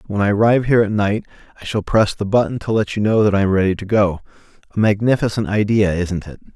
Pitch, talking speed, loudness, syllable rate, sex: 105 Hz, 240 wpm, -17 LUFS, 6.6 syllables/s, male